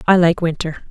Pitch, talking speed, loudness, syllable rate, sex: 170 Hz, 200 wpm, -17 LUFS, 5.6 syllables/s, female